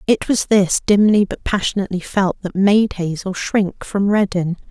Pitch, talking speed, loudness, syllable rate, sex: 195 Hz, 165 wpm, -17 LUFS, 4.7 syllables/s, female